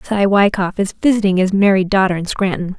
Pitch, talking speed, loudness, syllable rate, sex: 195 Hz, 195 wpm, -15 LUFS, 5.6 syllables/s, female